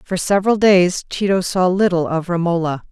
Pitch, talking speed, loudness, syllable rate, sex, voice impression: 180 Hz, 165 wpm, -17 LUFS, 5.2 syllables/s, female, very feminine, very adult-like, slightly middle-aged, thin, slightly tensed, powerful, slightly dark, hard, clear, fluent, slightly cool, intellectual, slightly refreshing, sincere, calm, slightly friendly, slightly reassuring, very unique, elegant, slightly wild, slightly lively, strict, slightly intense, sharp